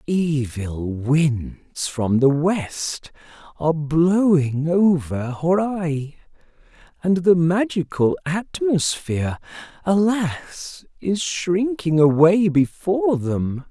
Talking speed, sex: 85 wpm, male